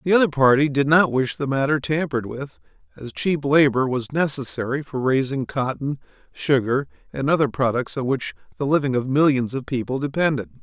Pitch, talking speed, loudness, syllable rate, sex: 140 Hz, 175 wpm, -21 LUFS, 5.4 syllables/s, male